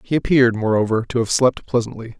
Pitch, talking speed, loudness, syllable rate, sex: 120 Hz, 190 wpm, -18 LUFS, 6.3 syllables/s, male